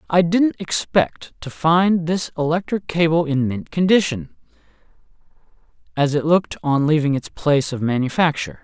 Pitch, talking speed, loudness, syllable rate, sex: 155 Hz, 140 wpm, -19 LUFS, 4.9 syllables/s, male